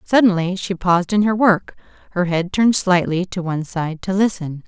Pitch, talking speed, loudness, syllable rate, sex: 185 Hz, 190 wpm, -18 LUFS, 5.3 syllables/s, female